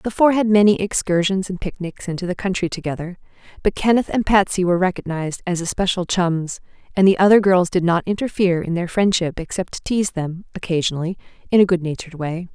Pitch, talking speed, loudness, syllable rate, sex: 185 Hz, 190 wpm, -19 LUFS, 6.1 syllables/s, female